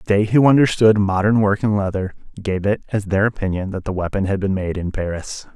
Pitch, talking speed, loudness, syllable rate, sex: 100 Hz, 215 wpm, -19 LUFS, 5.6 syllables/s, male